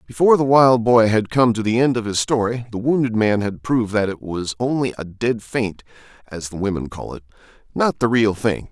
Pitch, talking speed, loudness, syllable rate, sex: 110 Hz, 225 wpm, -19 LUFS, 5.4 syllables/s, male